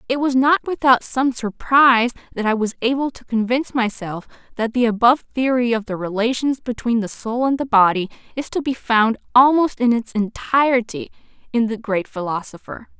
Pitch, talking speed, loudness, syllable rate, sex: 240 Hz, 175 wpm, -19 LUFS, 5.2 syllables/s, female